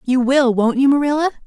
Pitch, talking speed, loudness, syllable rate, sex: 265 Hz, 205 wpm, -16 LUFS, 5.8 syllables/s, female